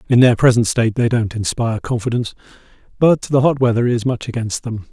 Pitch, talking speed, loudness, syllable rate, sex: 120 Hz, 195 wpm, -17 LUFS, 6.1 syllables/s, male